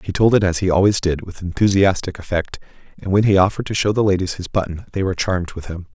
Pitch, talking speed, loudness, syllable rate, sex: 95 Hz, 250 wpm, -18 LUFS, 6.8 syllables/s, male